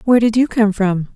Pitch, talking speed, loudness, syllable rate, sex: 215 Hz, 260 wpm, -15 LUFS, 5.9 syllables/s, female